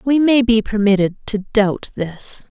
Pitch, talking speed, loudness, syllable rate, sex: 220 Hz, 160 wpm, -17 LUFS, 4.0 syllables/s, female